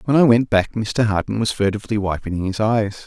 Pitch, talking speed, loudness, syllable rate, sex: 105 Hz, 215 wpm, -19 LUFS, 5.6 syllables/s, male